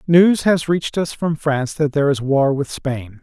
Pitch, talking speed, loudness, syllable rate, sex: 145 Hz, 225 wpm, -18 LUFS, 4.9 syllables/s, male